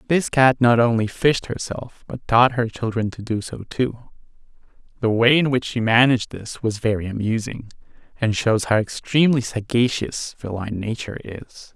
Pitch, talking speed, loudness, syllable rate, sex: 115 Hz, 165 wpm, -20 LUFS, 4.9 syllables/s, male